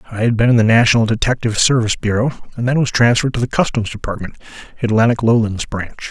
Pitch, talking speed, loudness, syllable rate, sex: 115 Hz, 195 wpm, -16 LUFS, 7.2 syllables/s, male